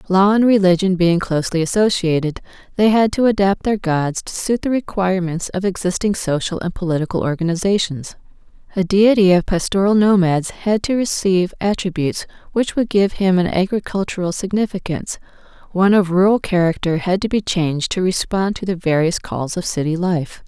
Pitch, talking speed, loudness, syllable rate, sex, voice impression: 185 Hz, 160 wpm, -18 LUFS, 5.5 syllables/s, female, feminine, adult-like, slightly weak, soft, fluent, slightly raspy, intellectual, calm, elegant, slightly sharp, modest